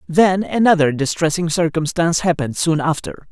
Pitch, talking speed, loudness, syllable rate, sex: 165 Hz, 125 wpm, -17 LUFS, 5.4 syllables/s, male